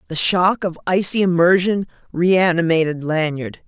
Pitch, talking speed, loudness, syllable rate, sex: 175 Hz, 115 wpm, -17 LUFS, 4.5 syllables/s, female